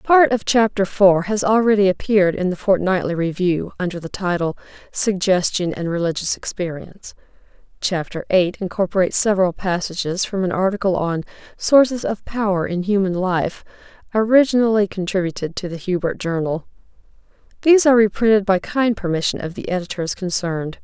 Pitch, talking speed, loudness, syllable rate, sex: 190 Hz, 140 wpm, -19 LUFS, 5.5 syllables/s, female